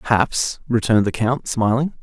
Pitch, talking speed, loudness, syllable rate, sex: 120 Hz, 150 wpm, -19 LUFS, 5.1 syllables/s, male